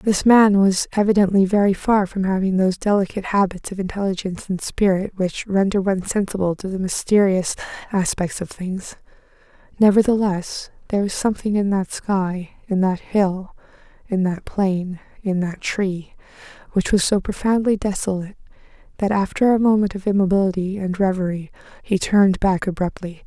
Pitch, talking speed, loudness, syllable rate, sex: 195 Hz, 150 wpm, -20 LUFS, 5.3 syllables/s, female